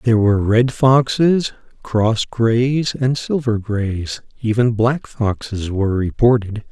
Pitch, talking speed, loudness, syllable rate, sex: 115 Hz, 125 wpm, -17 LUFS, 3.9 syllables/s, male